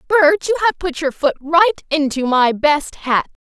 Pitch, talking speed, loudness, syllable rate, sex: 305 Hz, 190 wpm, -16 LUFS, 8.2 syllables/s, female